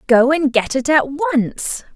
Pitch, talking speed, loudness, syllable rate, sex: 260 Hz, 185 wpm, -17 LUFS, 3.5 syllables/s, female